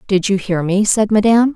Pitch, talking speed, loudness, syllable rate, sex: 205 Hz, 230 wpm, -15 LUFS, 5.8 syllables/s, female